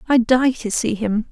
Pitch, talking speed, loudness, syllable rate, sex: 235 Hz, 230 wpm, -18 LUFS, 4.3 syllables/s, female